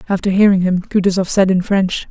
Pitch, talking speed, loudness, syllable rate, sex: 190 Hz, 200 wpm, -15 LUFS, 5.7 syllables/s, female